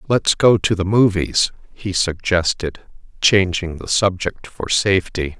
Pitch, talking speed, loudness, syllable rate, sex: 90 Hz, 135 wpm, -18 LUFS, 4.1 syllables/s, male